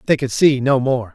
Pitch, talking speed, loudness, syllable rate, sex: 130 Hz, 265 wpm, -16 LUFS, 5.1 syllables/s, male